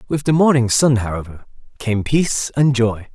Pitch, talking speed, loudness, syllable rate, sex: 125 Hz, 170 wpm, -17 LUFS, 5.0 syllables/s, male